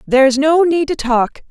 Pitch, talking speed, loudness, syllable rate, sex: 285 Hz, 200 wpm, -14 LUFS, 4.5 syllables/s, female